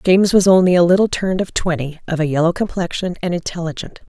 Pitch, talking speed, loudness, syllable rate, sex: 175 Hz, 200 wpm, -17 LUFS, 6.4 syllables/s, female